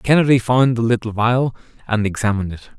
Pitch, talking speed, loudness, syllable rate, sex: 115 Hz, 170 wpm, -18 LUFS, 5.9 syllables/s, male